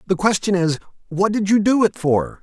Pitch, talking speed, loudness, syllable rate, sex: 190 Hz, 225 wpm, -19 LUFS, 5.2 syllables/s, male